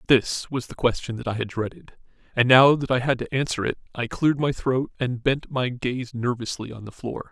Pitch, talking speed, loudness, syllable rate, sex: 125 Hz, 230 wpm, -24 LUFS, 5.3 syllables/s, male